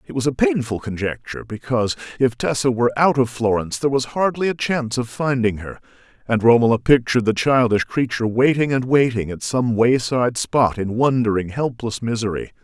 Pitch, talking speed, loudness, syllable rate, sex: 120 Hz, 175 wpm, -19 LUFS, 5.8 syllables/s, male